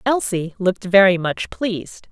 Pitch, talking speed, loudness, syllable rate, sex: 195 Hz, 140 wpm, -18 LUFS, 4.7 syllables/s, female